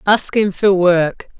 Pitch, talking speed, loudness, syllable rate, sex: 190 Hz, 130 wpm, -15 LUFS, 3.4 syllables/s, female